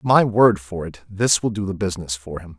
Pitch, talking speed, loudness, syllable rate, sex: 95 Hz, 255 wpm, -20 LUFS, 5.3 syllables/s, male